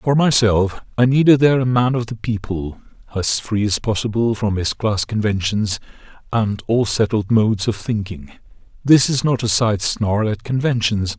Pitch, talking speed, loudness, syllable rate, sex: 110 Hz, 170 wpm, -18 LUFS, 4.7 syllables/s, male